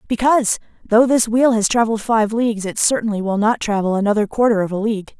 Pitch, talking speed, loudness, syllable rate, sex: 220 Hz, 210 wpm, -17 LUFS, 6.4 syllables/s, female